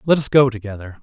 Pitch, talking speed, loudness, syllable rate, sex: 120 Hz, 235 wpm, -16 LUFS, 6.5 syllables/s, male